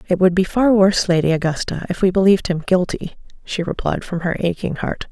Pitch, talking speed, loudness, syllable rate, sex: 185 Hz, 210 wpm, -18 LUFS, 5.8 syllables/s, female